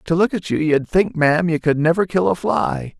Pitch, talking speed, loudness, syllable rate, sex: 160 Hz, 260 wpm, -18 LUFS, 5.2 syllables/s, male